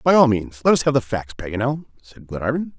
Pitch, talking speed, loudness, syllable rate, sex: 125 Hz, 235 wpm, -20 LUFS, 6.0 syllables/s, male